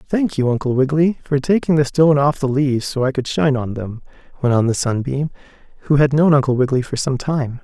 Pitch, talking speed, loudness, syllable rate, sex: 140 Hz, 230 wpm, -17 LUFS, 6.2 syllables/s, male